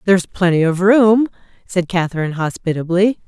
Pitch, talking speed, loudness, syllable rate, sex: 185 Hz, 130 wpm, -16 LUFS, 5.5 syllables/s, female